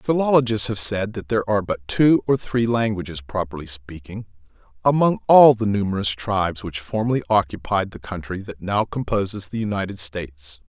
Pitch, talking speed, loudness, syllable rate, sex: 100 Hz, 160 wpm, -21 LUFS, 5.4 syllables/s, male